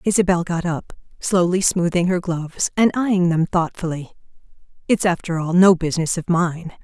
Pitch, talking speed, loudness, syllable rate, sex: 175 Hz, 160 wpm, -19 LUFS, 5.0 syllables/s, female